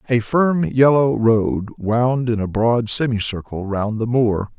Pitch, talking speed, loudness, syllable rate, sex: 115 Hz, 155 wpm, -18 LUFS, 3.8 syllables/s, male